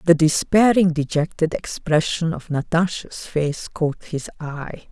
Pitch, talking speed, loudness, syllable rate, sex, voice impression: 160 Hz, 120 wpm, -21 LUFS, 3.9 syllables/s, female, feminine, very adult-like, slightly soft, slightly intellectual, calm, elegant